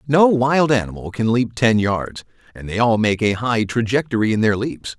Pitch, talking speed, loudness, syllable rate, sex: 115 Hz, 205 wpm, -18 LUFS, 4.9 syllables/s, male